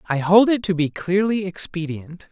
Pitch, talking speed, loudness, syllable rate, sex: 180 Hz, 180 wpm, -20 LUFS, 4.7 syllables/s, male